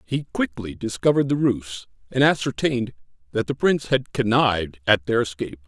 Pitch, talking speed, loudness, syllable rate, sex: 115 Hz, 160 wpm, -22 LUFS, 5.6 syllables/s, male